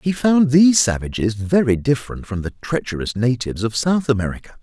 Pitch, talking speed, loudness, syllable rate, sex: 125 Hz, 170 wpm, -18 LUFS, 5.8 syllables/s, male